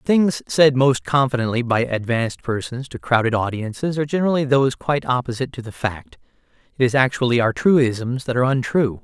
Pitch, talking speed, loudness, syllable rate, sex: 130 Hz, 180 wpm, -20 LUFS, 5.9 syllables/s, male